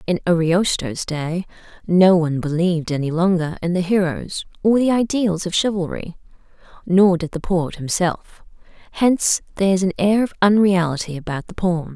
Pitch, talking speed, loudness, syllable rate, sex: 180 Hz, 155 wpm, -19 LUFS, 5.1 syllables/s, female